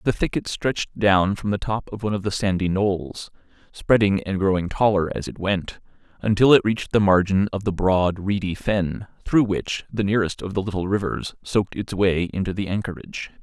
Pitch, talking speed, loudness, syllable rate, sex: 100 Hz, 195 wpm, -22 LUFS, 5.3 syllables/s, male